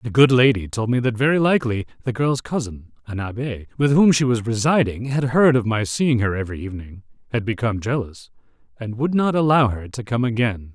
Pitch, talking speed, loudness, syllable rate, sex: 120 Hz, 205 wpm, -20 LUFS, 5.7 syllables/s, male